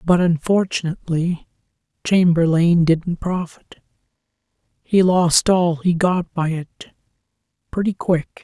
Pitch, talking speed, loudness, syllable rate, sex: 170 Hz, 90 wpm, -18 LUFS, 4.0 syllables/s, male